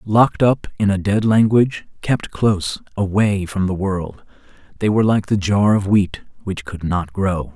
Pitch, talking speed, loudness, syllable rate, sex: 100 Hz, 185 wpm, -18 LUFS, 4.6 syllables/s, male